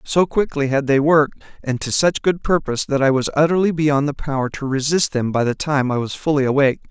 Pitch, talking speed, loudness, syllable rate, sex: 145 Hz, 235 wpm, -18 LUFS, 5.9 syllables/s, male